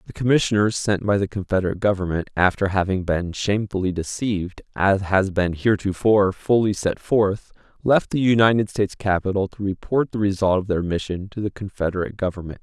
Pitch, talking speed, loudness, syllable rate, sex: 100 Hz, 165 wpm, -21 LUFS, 5.8 syllables/s, male